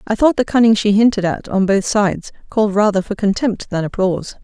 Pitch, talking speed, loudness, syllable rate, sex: 210 Hz, 215 wpm, -16 LUFS, 5.9 syllables/s, female